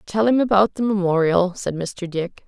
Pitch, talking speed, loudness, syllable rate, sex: 190 Hz, 195 wpm, -20 LUFS, 4.7 syllables/s, female